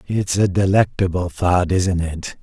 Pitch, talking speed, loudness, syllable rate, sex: 90 Hz, 150 wpm, -19 LUFS, 4.0 syllables/s, male